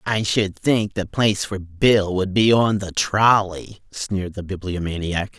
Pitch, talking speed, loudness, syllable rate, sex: 100 Hz, 165 wpm, -20 LUFS, 4.1 syllables/s, male